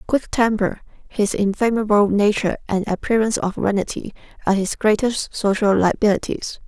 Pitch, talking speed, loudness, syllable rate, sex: 210 Hz, 125 wpm, -19 LUFS, 5.4 syllables/s, female